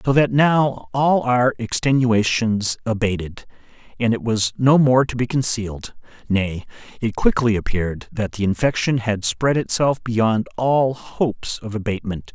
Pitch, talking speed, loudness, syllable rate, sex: 115 Hz, 145 wpm, -20 LUFS, 4.4 syllables/s, male